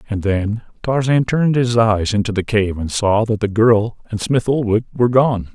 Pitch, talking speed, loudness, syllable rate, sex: 110 Hz, 205 wpm, -17 LUFS, 4.8 syllables/s, male